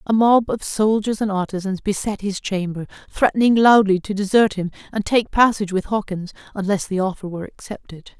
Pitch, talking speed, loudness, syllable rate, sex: 200 Hz, 175 wpm, -19 LUFS, 5.5 syllables/s, female